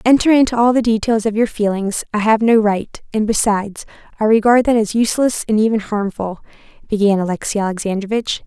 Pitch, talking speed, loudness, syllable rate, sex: 215 Hz, 185 wpm, -16 LUFS, 5.9 syllables/s, female